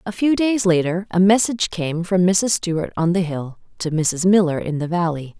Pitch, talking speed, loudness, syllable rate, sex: 180 Hz, 210 wpm, -19 LUFS, 4.8 syllables/s, female